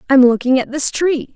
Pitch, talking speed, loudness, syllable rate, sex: 270 Hz, 220 wpm, -15 LUFS, 5.2 syllables/s, female